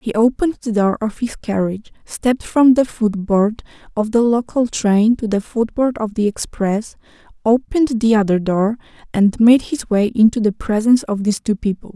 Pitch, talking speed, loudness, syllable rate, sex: 220 Hz, 180 wpm, -17 LUFS, 5.0 syllables/s, female